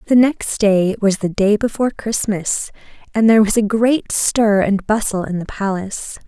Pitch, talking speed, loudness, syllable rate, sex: 210 Hz, 180 wpm, -17 LUFS, 4.7 syllables/s, female